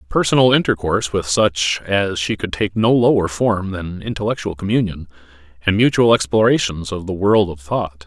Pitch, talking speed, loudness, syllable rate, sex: 100 Hz, 165 wpm, -17 LUFS, 5.0 syllables/s, male